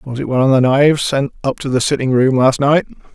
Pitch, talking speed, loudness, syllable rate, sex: 135 Hz, 265 wpm, -14 LUFS, 6.2 syllables/s, male